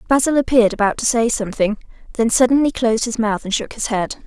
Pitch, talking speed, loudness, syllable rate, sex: 230 Hz, 210 wpm, -17 LUFS, 6.6 syllables/s, female